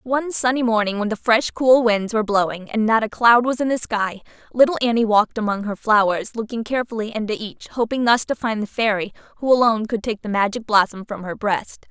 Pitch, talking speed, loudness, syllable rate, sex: 225 Hz, 220 wpm, -20 LUFS, 5.9 syllables/s, female